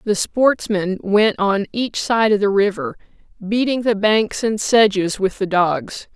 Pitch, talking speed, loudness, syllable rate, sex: 210 Hz, 165 wpm, -18 LUFS, 3.8 syllables/s, female